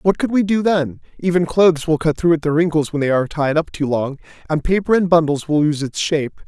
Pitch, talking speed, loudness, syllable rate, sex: 160 Hz, 260 wpm, -18 LUFS, 5.9 syllables/s, male